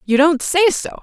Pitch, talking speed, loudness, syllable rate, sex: 315 Hz, 235 wpm, -15 LUFS, 4.4 syllables/s, female